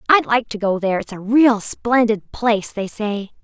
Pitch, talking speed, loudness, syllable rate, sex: 220 Hz, 210 wpm, -18 LUFS, 4.8 syllables/s, female